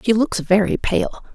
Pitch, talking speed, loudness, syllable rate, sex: 205 Hz, 180 wpm, -19 LUFS, 4.4 syllables/s, female